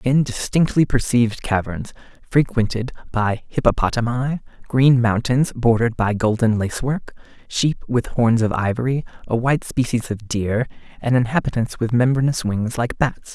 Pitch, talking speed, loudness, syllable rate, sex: 120 Hz, 145 wpm, -20 LUFS, 4.8 syllables/s, male